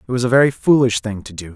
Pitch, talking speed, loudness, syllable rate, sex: 120 Hz, 310 wpm, -16 LUFS, 6.6 syllables/s, male